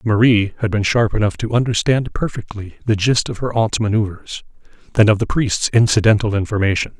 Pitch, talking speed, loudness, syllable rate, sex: 110 Hz, 180 wpm, -17 LUFS, 5.8 syllables/s, male